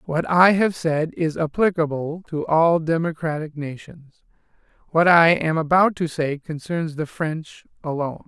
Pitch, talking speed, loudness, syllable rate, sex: 160 Hz, 145 wpm, -21 LUFS, 4.3 syllables/s, male